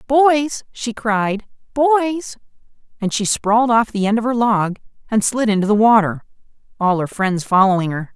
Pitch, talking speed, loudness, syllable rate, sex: 220 Hz, 170 wpm, -17 LUFS, 5.0 syllables/s, female